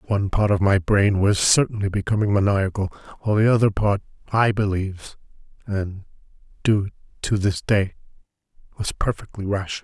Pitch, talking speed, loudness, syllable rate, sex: 100 Hz, 140 wpm, -22 LUFS, 5.5 syllables/s, male